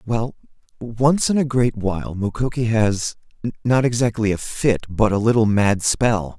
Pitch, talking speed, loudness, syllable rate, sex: 115 Hz, 150 wpm, -20 LUFS, 4.4 syllables/s, male